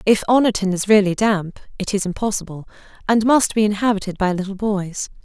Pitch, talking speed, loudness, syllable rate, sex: 200 Hz, 170 wpm, -19 LUFS, 5.6 syllables/s, female